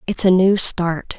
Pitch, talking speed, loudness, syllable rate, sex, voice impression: 185 Hz, 200 wpm, -15 LUFS, 3.9 syllables/s, female, feminine, slightly adult-like, slightly soft, slightly cute, sincere, slightly calm, friendly, kind